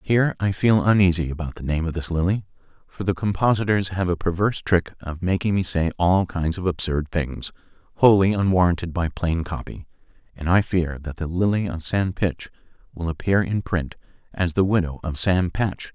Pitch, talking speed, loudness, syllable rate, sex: 90 Hz, 190 wpm, -22 LUFS, 5.1 syllables/s, male